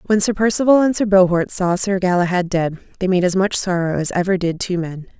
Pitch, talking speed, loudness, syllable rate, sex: 185 Hz, 230 wpm, -17 LUFS, 5.7 syllables/s, female